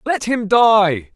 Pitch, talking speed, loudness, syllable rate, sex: 200 Hz, 155 wpm, -15 LUFS, 2.9 syllables/s, male